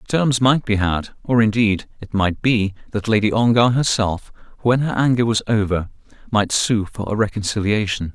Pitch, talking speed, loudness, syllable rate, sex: 110 Hz, 170 wpm, -19 LUFS, 4.9 syllables/s, male